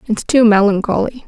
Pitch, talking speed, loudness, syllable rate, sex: 220 Hz, 140 wpm, -13 LUFS, 5.3 syllables/s, female